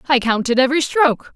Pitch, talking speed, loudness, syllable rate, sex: 265 Hz, 175 wpm, -16 LUFS, 6.9 syllables/s, female